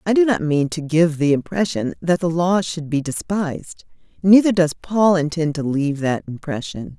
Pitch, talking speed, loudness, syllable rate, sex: 165 Hz, 190 wpm, -19 LUFS, 4.8 syllables/s, female